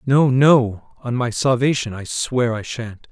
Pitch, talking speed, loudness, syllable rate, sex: 125 Hz, 175 wpm, -19 LUFS, 3.9 syllables/s, male